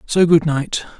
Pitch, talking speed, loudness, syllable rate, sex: 155 Hz, 180 wpm, -16 LUFS, 4.0 syllables/s, male